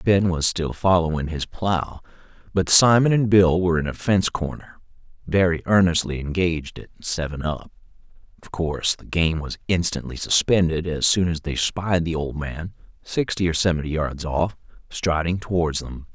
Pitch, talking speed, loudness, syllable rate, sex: 85 Hz, 165 wpm, -22 LUFS, 4.9 syllables/s, male